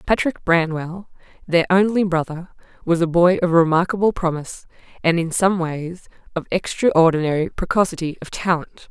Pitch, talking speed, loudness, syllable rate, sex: 175 Hz, 135 wpm, -19 LUFS, 5.0 syllables/s, female